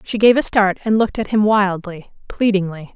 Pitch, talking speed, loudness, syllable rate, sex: 200 Hz, 205 wpm, -17 LUFS, 5.3 syllables/s, female